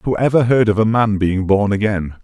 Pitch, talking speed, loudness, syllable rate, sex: 105 Hz, 240 wpm, -16 LUFS, 5.1 syllables/s, male